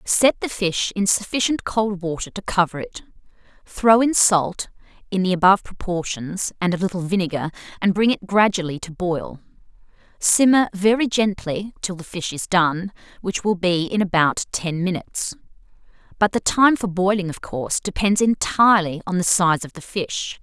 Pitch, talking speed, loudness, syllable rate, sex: 190 Hz, 165 wpm, -20 LUFS, 4.9 syllables/s, female